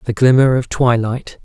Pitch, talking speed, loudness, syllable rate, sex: 125 Hz, 165 wpm, -14 LUFS, 4.7 syllables/s, male